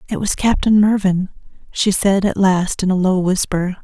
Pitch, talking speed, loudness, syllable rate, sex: 190 Hz, 190 wpm, -16 LUFS, 4.6 syllables/s, female